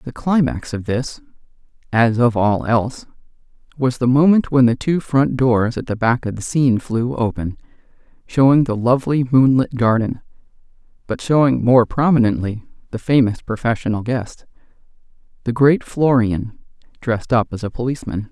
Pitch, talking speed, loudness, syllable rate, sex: 125 Hz, 145 wpm, -17 LUFS, 5.0 syllables/s, male